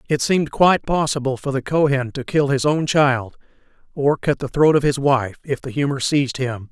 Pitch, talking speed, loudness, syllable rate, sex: 140 Hz, 215 wpm, -19 LUFS, 5.3 syllables/s, male